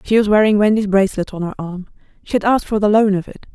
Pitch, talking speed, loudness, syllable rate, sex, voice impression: 205 Hz, 270 wpm, -16 LUFS, 7.0 syllables/s, female, feminine, adult-like, slightly relaxed, powerful, soft, slightly muffled, slightly raspy, intellectual, calm, slightly reassuring, elegant, lively, slightly sharp